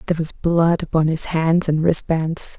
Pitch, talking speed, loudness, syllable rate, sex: 165 Hz, 210 wpm, -18 LUFS, 4.6 syllables/s, female